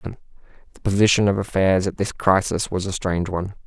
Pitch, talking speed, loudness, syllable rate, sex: 95 Hz, 180 wpm, -21 LUFS, 8.2 syllables/s, male